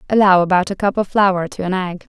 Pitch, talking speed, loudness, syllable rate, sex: 190 Hz, 250 wpm, -16 LUFS, 5.8 syllables/s, female